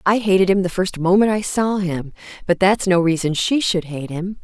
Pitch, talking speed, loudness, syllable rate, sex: 185 Hz, 230 wpm, -18 LUFS, 5.0 syllables/s, female